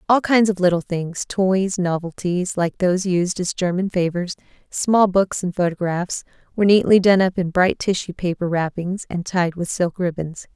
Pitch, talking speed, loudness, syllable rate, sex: 180 Hz, 170 wpm, -20 LUFS, 4.7 syllables/s, female